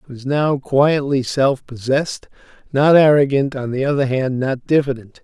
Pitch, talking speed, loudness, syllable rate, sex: 135 Hz, 160 wpm, -17 LUFS, 4.7 syllables/s, male